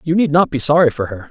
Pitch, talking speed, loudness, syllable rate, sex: 150 Hz, 320 wpm, -15 LUFS, 6.6 syllables/s, male